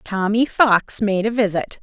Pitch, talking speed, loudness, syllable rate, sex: 210 Hz, 165 wpm, -18 LUFS, 4.1 syllables/s, female